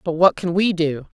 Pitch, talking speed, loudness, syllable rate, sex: 170 Hz, 250 wpm, -19 LUFS, 5.0 syllables/s, female